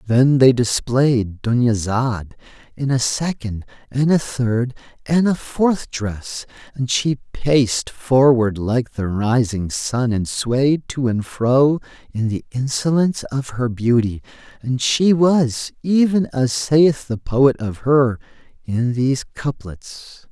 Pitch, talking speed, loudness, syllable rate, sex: 125 Hz, 135 wpm, -18 LUFS, 3.5 syllables/s, male